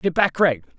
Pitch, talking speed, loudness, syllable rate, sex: 165 Hz, 230 wpm, -20 LUFS, 4.7 syllables/s, male